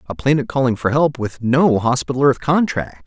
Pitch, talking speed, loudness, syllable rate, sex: 135 Hz, 195 wpm, -17 LUFS, 5.1 syllables/s, male